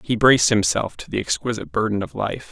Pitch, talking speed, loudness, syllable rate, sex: 110 Hz, 215 wpm, -20 LUFS, 6.2 syllables/s, male